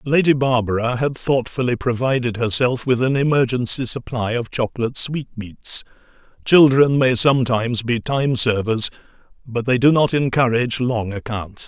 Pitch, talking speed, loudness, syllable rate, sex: 125 Hz, 135 wpm, -18 LUFS, 4.9 syllables/s, male